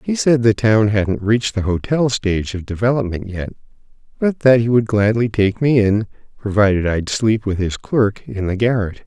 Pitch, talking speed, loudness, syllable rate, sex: 110 Hz, 190 wpm, -17 LUFS, 4.8 syllables/s, male